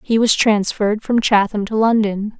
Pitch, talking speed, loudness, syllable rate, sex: 215 Hz, 175 wpm, -16 LUFS, 4.8 syllables/s, female